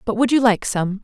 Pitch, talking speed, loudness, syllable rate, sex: 220 Hz, 290 wpm, -18 LUFS, 5.5 syllables/s, female